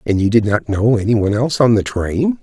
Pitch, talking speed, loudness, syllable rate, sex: 110 Hz, 270 wpm, -15 LUFS, 6.1 syllables/s, male